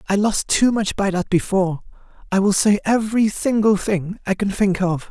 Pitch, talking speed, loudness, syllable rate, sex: 200 Hz, 200 wpm, -19 LUFS, 5.1 syllables/s, male